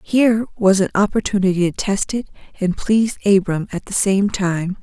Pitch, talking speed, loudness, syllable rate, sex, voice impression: 200 Hz, 175 wpm, -18 LUFS, 5.3 syllables/s, female, feminine, adult-like, slightly relaxed, slightly dark, soft, raspy, intellectual, friendly, reassuring, lively, kind